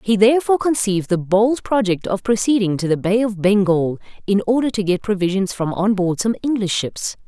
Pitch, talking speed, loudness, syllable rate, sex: 205 Hz, 200 wpm, -18 LUFS, 5.5 syllables/s, female